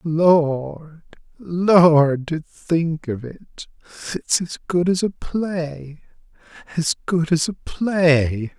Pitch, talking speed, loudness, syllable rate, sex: 165 Hz, 105 wpm, -20 LUFS, 2.6 syllables/s, male